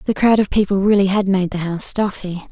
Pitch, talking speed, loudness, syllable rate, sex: 195 Hz, 240 wpm, -17 LUFS, 5.9 syllables/s, female